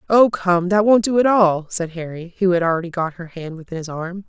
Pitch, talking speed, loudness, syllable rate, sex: 180 Hz, 250 wpm, -18 LUFS, 5.5 syllables/s, female